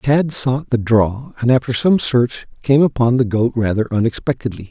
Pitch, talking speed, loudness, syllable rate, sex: 120 Hz, 180 wpm, -17 LUFS, 4.8 syllables/s, male